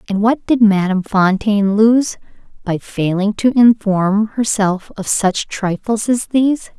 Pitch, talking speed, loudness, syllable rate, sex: 210 Hz, 140 wpm, -15 LUFS, 4.1 syllables/s, female